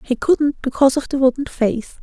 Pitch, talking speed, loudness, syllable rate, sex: 265 Hz, 205 wpm, -18 LUFS, 5.5 syllables/s, female